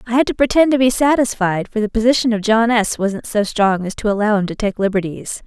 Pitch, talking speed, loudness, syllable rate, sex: 220 Hz, 250 wpm, -17 LUFS, 5.8 syllables/s, female